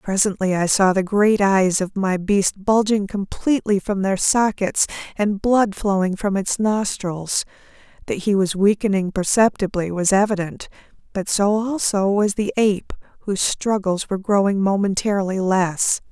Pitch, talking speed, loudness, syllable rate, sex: 200 Hz, 145 wpm, -19 LUFS, 4.6 syllables/s, female